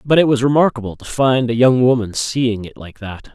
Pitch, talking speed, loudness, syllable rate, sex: 120 Hz, 235 wpm, -16 LUFS, 5.2 syllables/s, male